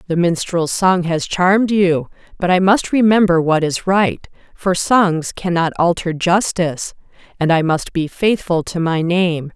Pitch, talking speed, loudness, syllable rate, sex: 175 Hz, 165 wpm, -16 LUFS, 4.2 syllables/s, female